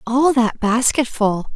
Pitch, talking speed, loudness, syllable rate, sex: 240 Hz, 115 wpm, -17 LUFS, 3.6 syllables/s, female